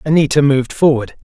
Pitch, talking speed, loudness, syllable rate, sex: 140 Hz, 130 wpm, -14 LUFS, 6.4 syllables/s, male